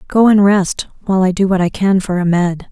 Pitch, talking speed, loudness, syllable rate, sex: 190 Hz, 245 wpm, -14 LUFS, 5.5 syllables/s, female